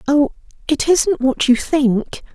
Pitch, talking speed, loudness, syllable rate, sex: 280 Hz, 155 wpm, -17 LUFS, 3.4 syllables/s, female